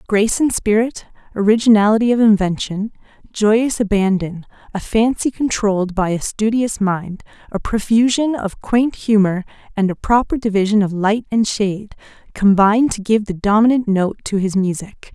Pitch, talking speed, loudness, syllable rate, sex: 210 Hz, 145 wpm, -17 LUFS, 4.9 syllables/s, female